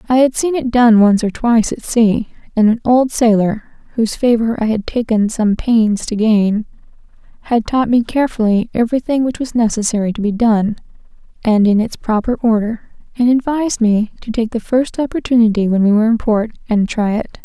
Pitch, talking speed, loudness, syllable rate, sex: 225 Hz, 190 wpm, -15 LUFS, 5.3 syllables/s, female